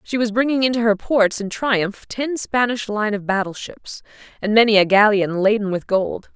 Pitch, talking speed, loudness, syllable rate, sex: 215 Hz, 200 wpm, -18 LUFS, 4.8 syllables/s, female